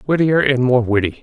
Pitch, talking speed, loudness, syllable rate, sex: 130 Hz, 195 wpm, -15 LUFS, 5.5 syllables/s, male